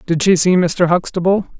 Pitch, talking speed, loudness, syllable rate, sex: 180 Hz, 190 wpm, -15 LUFS, 4.8 syllables/s, female